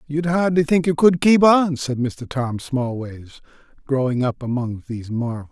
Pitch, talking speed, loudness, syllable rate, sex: 140 Hz, 175 wpm, -20 LUFS, 4.7 syllables/s, male